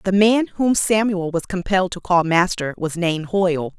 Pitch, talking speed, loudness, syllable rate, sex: 185 Hz, 190 wpm, -19 LUFS, 5.0 syllables/s, female